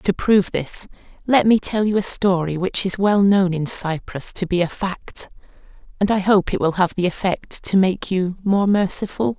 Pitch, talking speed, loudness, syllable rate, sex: 190 Hz, 205 wpm, -19 LUFS, 4.6 syllables/s, female